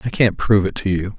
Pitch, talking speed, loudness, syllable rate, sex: 100 Hz, 305 wpm, -18 LUFS, 6.7 syllables/s, male